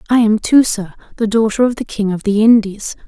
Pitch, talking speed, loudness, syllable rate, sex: 215 Hz, 215 wpm, -14 LUFS, 5.5 syllables/s, female